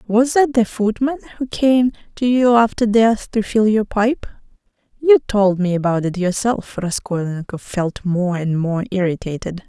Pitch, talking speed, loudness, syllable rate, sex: 210 Hz, 160 wpm, -18 LUFS, 4.4 syllables/s, female